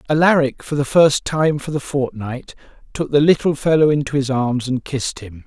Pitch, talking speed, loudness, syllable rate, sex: 140 Hz, 200 wpm, -18 LUFS, 5.1 syllables/s, male